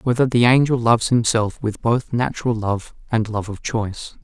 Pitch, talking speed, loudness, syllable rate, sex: 115 Hz, 185 wpm, -19 LUFS, 5.1 syllables/s, male